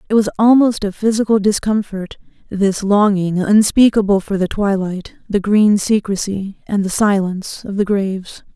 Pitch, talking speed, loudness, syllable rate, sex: 205 Hz, 145 wpm, -16 LUFS, 4.7 syllables/s, female